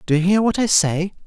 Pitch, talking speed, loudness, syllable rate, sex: 185 Hz, 285 wpm, -18 LUFS, 5.8 syllables/s, male